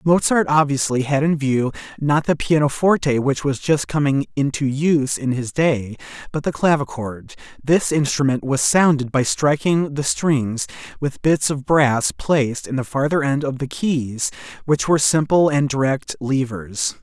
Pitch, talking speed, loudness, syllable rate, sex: 140 Hz, 160 wpm, -19 LUFS, 4.4 syllables/s, male